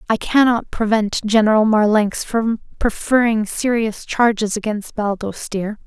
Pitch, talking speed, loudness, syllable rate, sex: 220 Hz, 125 wpm, -18 LUFS, 4.2 syllables/s, female